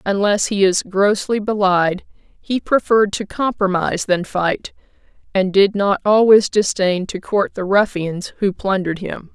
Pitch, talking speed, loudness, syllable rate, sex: 195 Hz, 150 wpm, -17 LUFS, 4.3 syllables/s, female